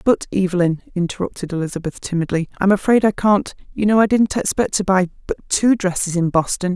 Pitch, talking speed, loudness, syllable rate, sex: 190 Hz, 185 wpm, -18 LUFS, 5.7 syllables/s, female